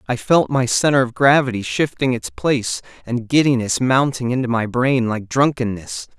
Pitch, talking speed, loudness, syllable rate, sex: 125 Hz, 165 wpm, -18 LUFS, 4.9 syllables/s, male